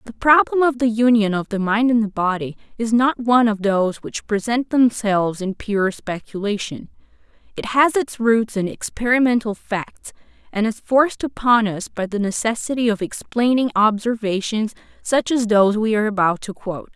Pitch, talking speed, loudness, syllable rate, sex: 225 Hz, 170 wpm, -19 LUFS, 5.0 syllables/s, female